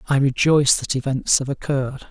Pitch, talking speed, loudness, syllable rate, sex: 135 Hz, 170 wpm, -19 LUFS, 5.7 syllables/s, male